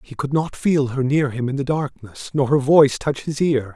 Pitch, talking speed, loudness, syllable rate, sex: 140 Hz, 255 wpm, -20 LUFS, 5.0 syllables/s, male